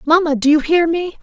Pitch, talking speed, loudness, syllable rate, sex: 320 Hz, 245 wpm, -15 LUFS, 5.5 syllables/s, female